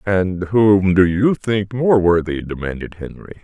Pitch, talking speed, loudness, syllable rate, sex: 95 Hz, 155 wpm, -17 LUFS, 4.0 syllables/s, male